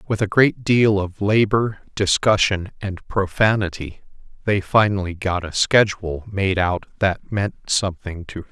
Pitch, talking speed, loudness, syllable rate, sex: 100 Hz, 150 wpm, -20 LUFS, 4.4 syllables/s, male